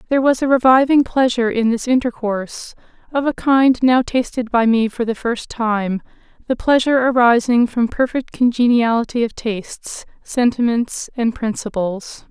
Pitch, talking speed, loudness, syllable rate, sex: 240 Hz, 140 wpm, -17 LUFS, 4.8 syllables/s, female